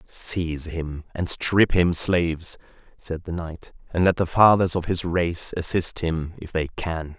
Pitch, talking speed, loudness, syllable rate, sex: 85 Hz, 175 wpm, -23 LUFS, 4.0 syllables/s, male